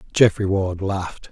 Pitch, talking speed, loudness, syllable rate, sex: 95 Hz, 135 wpm, -21 LUFS, 4.8 syllables/s, male